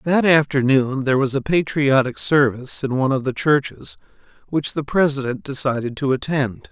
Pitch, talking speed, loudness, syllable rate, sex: 140 Hz, 160 wpm, -19 LUFS, 5.3 syllables/s, male